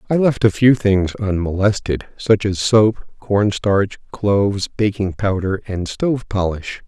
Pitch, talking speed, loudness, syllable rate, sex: 100 Hz, 140 wpm, -18 LUFS, 4.0 syllables/s, male